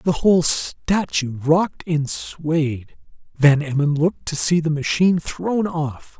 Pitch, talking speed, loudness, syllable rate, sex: 160 Hz, 145 wpm, -20 LUFS, 3.8 syllables/s, male